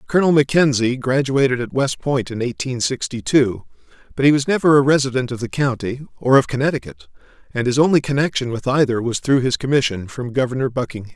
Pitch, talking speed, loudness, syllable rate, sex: 130 Hz, 190 wpm, -18 LUFS, 6.0 syllables/s, male